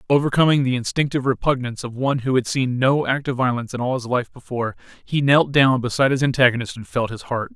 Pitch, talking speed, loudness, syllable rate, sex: 130 Hz, 220 wpm, -20 LUFS, 6.7 syllables/s, male